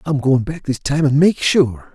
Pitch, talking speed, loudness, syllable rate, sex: 140 Hz, 245 wpm, -16 LUFS, 4.3 syllables/s, male